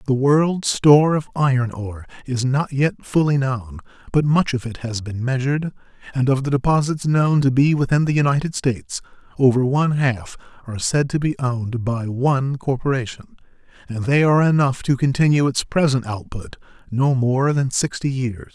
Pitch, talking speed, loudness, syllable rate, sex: 135 Hz, 175 wpm, -19 LUFS, 5.1 syllables/s, male